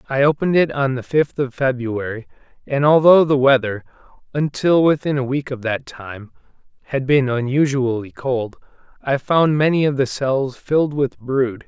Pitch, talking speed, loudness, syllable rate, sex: 135 Hz, 165 wpm, -18 LUFS, 4.7 syllables/s, male